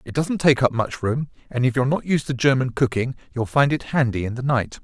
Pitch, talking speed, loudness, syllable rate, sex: 130 Hz, 260 wpm, -21 LUFS, 5.8 syllables/s, male